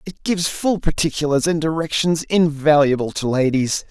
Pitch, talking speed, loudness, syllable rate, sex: 155 Hz, 140 wpm, -19 LUFS, 5.1 syllables/s, male